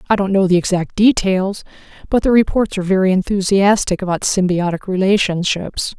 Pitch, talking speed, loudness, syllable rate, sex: 190 Hz, 150 wpm, -16 LUFS, 5.5 syllables/s, female